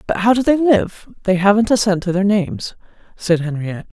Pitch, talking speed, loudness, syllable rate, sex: 200 Hz, 195 wpm, -16 LUFS, 5.6 syllables/s, female